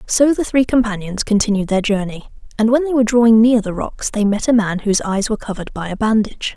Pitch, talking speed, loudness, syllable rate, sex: 220 Hz, 240 wpm, -16 LUFS, 6.4 syllables/s, female